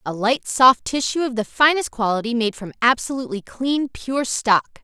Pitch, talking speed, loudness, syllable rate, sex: 240 Hz, 175 wpm, -20 LUFS, 4.8 syllables/s, female